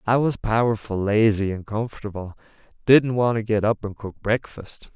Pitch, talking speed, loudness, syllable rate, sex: 110 Hz, 170 wpm, -22 LUFS, 4.9 syllables/s, male